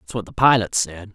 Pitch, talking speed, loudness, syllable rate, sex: 105 Hz, 260 wpm, -19 LUFS, 5.4 syllables/s, male